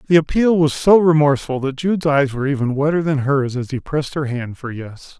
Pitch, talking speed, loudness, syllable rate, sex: 145 Hz, 230 wpm, -18 LUFS, 5.8 syllables/s, male